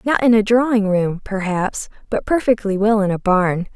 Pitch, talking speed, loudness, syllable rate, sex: 210 Hz, 190 wpm, -18 LUFS, 4.8 syllables/s, female